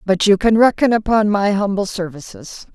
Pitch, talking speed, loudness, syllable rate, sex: 205 Hz, 175 wpm, -16 LUFS, 5.0 syllables/s, female